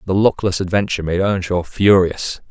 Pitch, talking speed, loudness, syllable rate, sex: 95 Hz, 145 wpm, -17 LUFS, 5.2 syllables/s, male